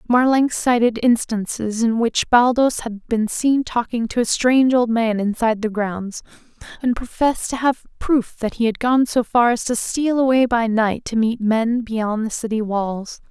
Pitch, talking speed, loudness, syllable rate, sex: 230 Hz, 190 wpm, -19 LUFS, 4.5 syllables/s, female